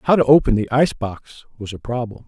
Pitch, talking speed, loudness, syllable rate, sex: 120 Hz, 235 wpm, -18 LUFS, 5.8 syllables/s, male